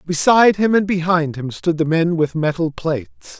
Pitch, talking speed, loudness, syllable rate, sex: 165 Hz, 195 wpm, -17 LUFS, 4.9 syllables/s, male